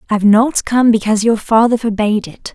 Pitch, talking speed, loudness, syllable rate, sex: 220 Hz, 190 wpm, -13 LUFS, 6.0 syllables/s, female